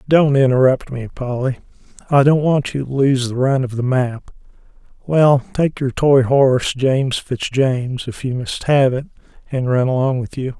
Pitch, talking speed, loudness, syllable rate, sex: 130 Hz, 170 wpm, -17 LUFS, 4.7 syllables/s, male